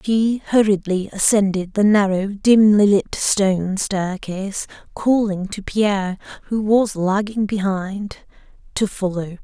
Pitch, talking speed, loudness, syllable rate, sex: 200 Hz, 115 wpm, -19 LUFS, 3.9 syllables/s, female